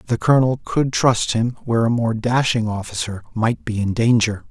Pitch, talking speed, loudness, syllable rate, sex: 115 Hz, 185 wpm, -19 LUFS, 5.2 syllables/s, male